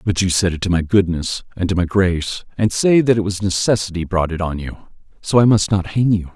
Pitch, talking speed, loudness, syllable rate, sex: 95 Hz, 255 wpm, -18 LUFS, 5.7 syllables/s, male